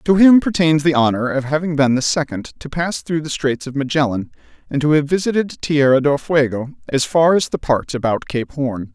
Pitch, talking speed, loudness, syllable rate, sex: 145 Hz, 215 wpm, -17 LUFS, 5.2 syllables/s, male